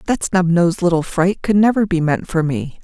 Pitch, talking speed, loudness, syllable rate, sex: 180 Hz, 235 wpm, -16 LUFS, 5.3 syllables/s, female